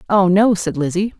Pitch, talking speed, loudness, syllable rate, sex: 190 Hz, 200 wpm, -16 LUFS, 5.2 syllables/s, female